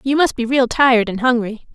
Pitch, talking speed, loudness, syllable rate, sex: 245 Hz, 240 wpm, -16 LUFS, 5.8 syllables/s, female